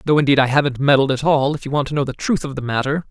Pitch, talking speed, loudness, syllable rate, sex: 140 Hz, 330 wpm, -18 LUFS, 7.2 syllables/s, male